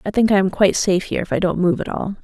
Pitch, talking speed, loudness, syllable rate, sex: 190 Hz, 350 wpm, -18 LUFS, 7.7 syllables/s, female